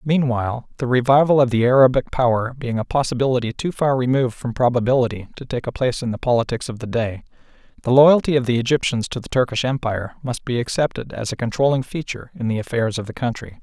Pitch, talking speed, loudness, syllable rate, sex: 125 Hz, 205 wpm, -20 LUFS, 6.4 syllables/s, male